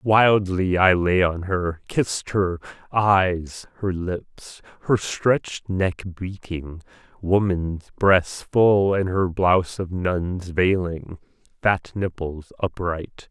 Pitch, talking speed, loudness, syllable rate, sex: 90 Hz, 115 wpm, -22 LUFS, 3.1 syllables/s, male